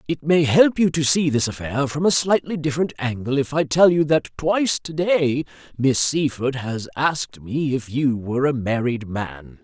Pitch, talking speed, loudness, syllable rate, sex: 140 Hz, 195 wpm, -20 LUFS, 4.7 syllables/s, male